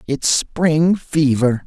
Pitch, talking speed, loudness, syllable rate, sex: 145 Hz, 110 wpm, -17 LUFS, 2.7 syllables/s, male